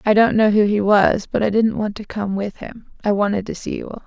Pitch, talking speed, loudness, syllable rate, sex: 210 Hz, 295 wpm, -19 LUFS, 6.1 syllables/s, female